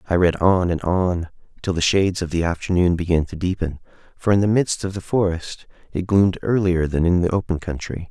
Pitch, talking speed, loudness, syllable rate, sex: 90 Hz, 215 wpm, -20 LUFS, 5.6 syllables/s, male